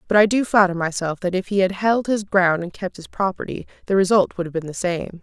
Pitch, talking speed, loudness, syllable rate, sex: 190 Hz, 265 wpm, -20 LUFS, 5.8 syllables/s, female